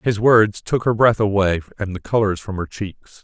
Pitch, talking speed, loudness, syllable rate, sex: 105 Hz, 225 wpm, -18 LUFS, 4.8 syllables/s, male